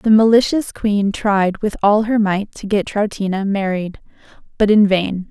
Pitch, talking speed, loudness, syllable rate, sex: 205 Hz, 170 wpm, -17 LUFS, 4.3 syllables/s, female